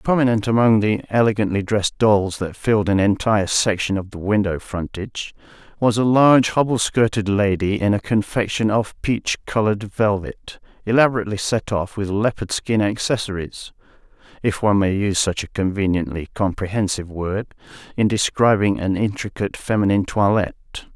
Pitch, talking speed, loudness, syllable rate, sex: 105 Hz, 145 wpm, -20 LUFS, 5.5 syllables/s, male